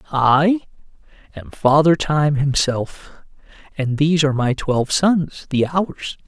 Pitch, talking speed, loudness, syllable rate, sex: 150 Hz, 125 wpm, -18 LUFS, 4.0 syllables/s, male